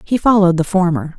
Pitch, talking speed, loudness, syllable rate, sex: 180 Hz, 200 wpm, -14 LUFS, 6.5 syllables/s, female